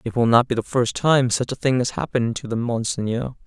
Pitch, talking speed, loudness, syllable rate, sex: 125 Hz, 260 wpm, -21 LUFS, 5.8 syllables/s, male